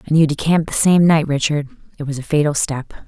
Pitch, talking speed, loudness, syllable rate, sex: 150 Hz, 235 wpm, -17 LUFS, 6.6 syllables/s, female